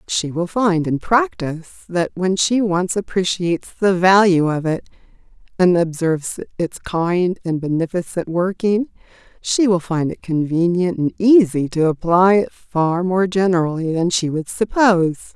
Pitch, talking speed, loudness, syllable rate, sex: 180 Hz, 150 wpm, -18 LUFS, 4.6 syllables/s, female